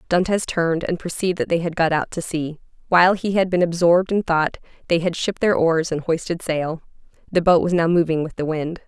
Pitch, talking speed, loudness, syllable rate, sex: 170 Hz, 230 wpm, -20 LUFS, 5.8 syllables/s, female